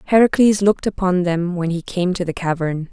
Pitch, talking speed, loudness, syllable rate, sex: 180 Hz, 205 wpm, -18 LUFS, 5.6 syllables/s, female